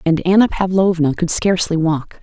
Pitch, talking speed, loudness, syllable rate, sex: 175 Hz, 160 wpm, -16 LUFS, 5.3 syllables/s, female